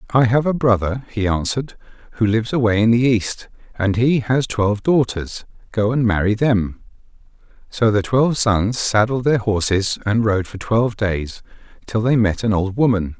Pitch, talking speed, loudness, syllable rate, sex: 110 Hz, 175 wpm, -18 LUFS, 4.9 syllables/s, male